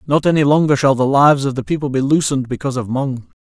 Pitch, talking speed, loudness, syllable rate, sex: 135 Hz, 245 wpm, -16 LUFS, 6.9 syllables/s, male